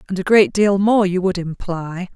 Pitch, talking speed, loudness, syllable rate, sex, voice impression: 185 Hz, 225 wpm, -17 LUFS, 4.7 syllables/s, female, very feminine, adult-like, very thin, tensed, very powerful, dark, slightly hard, soft, clear, fluent, slightly raspy, cute, very intellectual, refreshing, very sincere, calm, very friendly, very reassuring, unique, elegant, wild, sweet, lively, strict, intense, sharp